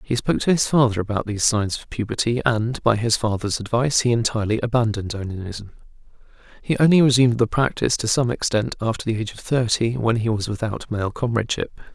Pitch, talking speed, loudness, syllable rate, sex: 115 Hz, 190 wpm, -21 LUFS, 6.4 syllables/s, male